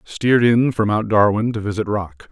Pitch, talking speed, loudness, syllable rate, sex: 110 Hz, 205 wpm, -18 LUFS, 5.0 syllables/s, male